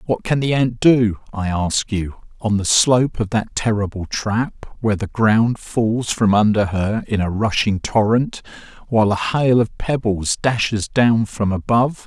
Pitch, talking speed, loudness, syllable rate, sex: 110 Hz, 175 wpm, -18 LUFS, 4.3 syllables/s, male